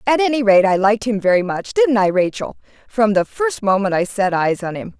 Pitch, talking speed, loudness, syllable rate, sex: 210 Hz, 230 wpm, -17 LUFS, 5.6 syllables/s, female